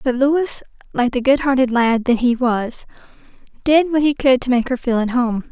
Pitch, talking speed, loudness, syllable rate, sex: 255 Hz, 220 wpm, -17 LUFS, 4.9 syllables/s, female